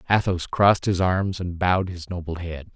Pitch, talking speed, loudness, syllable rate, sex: 90 Hz, 195 wpm, -23 LUFS, 5.2 syllables/s, male